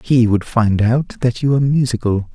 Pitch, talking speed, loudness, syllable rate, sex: 120 Hz, 205 wpm, -16 LUFS, 4.9 syllables/s, male